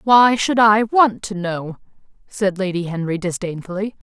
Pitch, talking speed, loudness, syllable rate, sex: 200 Hz, 145 wpm, -18 LUFS, 4.4 syllables/s, female